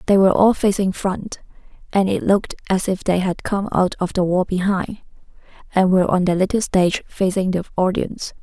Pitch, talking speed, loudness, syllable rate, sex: 190 Hz, 190 wpm, -19 LUFS, 5.6 syllables/s, female